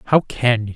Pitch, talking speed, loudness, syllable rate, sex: 120 Hz, 235 wpm, -18 LUFS, 4.0 syllables/s, male